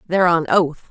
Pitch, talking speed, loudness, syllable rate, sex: 165 Hz, 200 wpm, -17 LUFS, 5.1 syllables/s, female